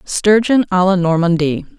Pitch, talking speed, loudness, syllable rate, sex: 185 Hz, 170 wpm, -14 LUFS, 5.3 syllables/s, female